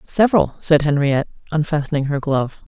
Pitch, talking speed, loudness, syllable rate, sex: 150 Hz, 130 wpm, -18 LUFS, 6.1 syllables/s, female